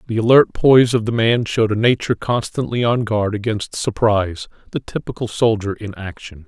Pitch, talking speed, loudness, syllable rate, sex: 110 Hz, 165 wpm, -18 LUFS, 5.5 syllables/s, male